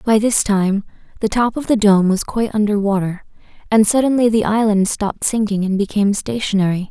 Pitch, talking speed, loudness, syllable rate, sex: 210 Hz, 185 wpm, -17 LUFS, 5.7 syllables/s, female